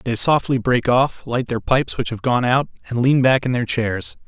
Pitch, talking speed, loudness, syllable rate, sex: 125 Hz, 240 wpm, -19 LUFS, 4.9 syllables/s, male